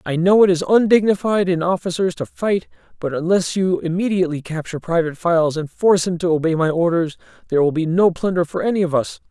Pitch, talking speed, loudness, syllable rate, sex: 170 Hz, 205 wpm, -18 LUFS, 6.3 syllables/s, male